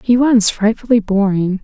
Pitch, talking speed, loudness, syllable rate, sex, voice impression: 215 Hz, 145 wpm, -14 LUFS, 4.6 syllables/s, female, very feminine, slightly young, very adult-like, very thin, slightly relaxed, slightly weak, slightly dark, soft, clear, fluent, very cute, intellectual, refreshing, sincere, very calm, very friendly, very reassuring, very unique, very elegant, wild, sweet, slightly lively, very kind, slightly modest